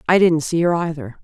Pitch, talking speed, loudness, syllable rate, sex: 160 Hz, 245 wpm, -18 LUFS, 5.7 syllables/s, female